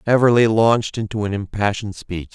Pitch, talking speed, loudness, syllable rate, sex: 105 Hz, 155 wpm, -18 LUFS, 5.9 syllables/s, male